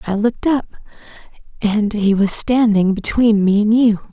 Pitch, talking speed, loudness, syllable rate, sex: 215 Hz, 160 wpm, -16 LUFS, 4.7 syllables/s, female